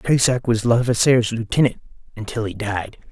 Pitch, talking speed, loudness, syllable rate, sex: 115 Hz, 135 wpm, -19 LUFS, 5.3 syllables/s, male